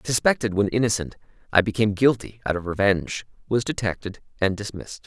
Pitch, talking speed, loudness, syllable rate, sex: 105 Hz, 155 wpm, -23 LUFS, 6.2 syllables/s, male